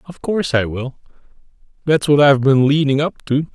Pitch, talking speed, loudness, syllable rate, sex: 140 Hz, 185 wpm, -16 LUFS, 5.5 syllables/s, male